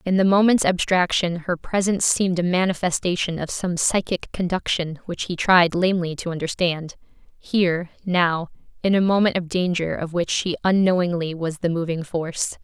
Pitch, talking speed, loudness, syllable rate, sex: 175 Hz, 155 wpm, -21 LUFS, 5.2 syllables/s, female